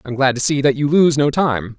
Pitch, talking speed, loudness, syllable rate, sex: 140 Hz, 305 wpm, -16 LUFS, 5.3 syllables/s, male